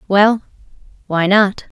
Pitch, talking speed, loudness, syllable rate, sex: 200 Hz, 100 wpm, -15 LUFS, 3.4 syllables/s, female